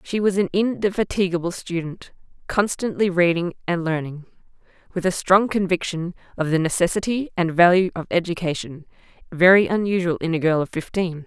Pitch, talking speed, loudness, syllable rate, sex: 180 Hz, 145 wpm, -21 LUFS, 5.4 syllables/s, female